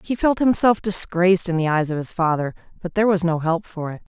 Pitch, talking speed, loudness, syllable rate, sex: 180 Hz, 245 wpm, -20 LUFS, 6.0 syllables/s, female